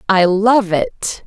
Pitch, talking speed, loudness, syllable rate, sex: 210 Hz, 145 wpm, -15 LUFS, 2.8 syllables/s, female